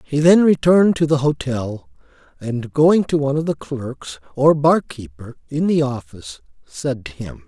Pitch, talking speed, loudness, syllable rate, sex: 145 Hz, 175 wpm, -18 LUFS, 4.6 syllables/s, male